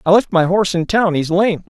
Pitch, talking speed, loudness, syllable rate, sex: 185 Hz, 240 wpm, -15 LUFS, 5.8 syllables/s, male